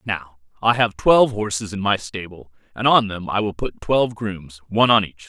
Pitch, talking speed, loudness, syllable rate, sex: 100 Hz, 215 wpm, -20 LUFS, 5.2 syllables/s, male